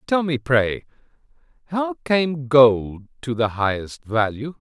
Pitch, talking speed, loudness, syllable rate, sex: 135 Hz, 130 wpm, -20 LUFS, 3.6 syllables/s, male